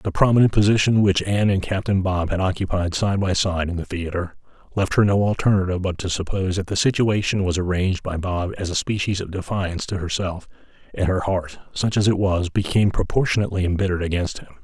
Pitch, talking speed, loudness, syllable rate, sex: 95 Hz, 200 wpm, -21 LUFS, 6.2 syllables/s, male